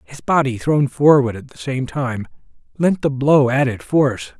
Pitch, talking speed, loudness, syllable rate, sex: 135 Hz, 180 wpm, -17 LUFS, 4.5 syllables/s, male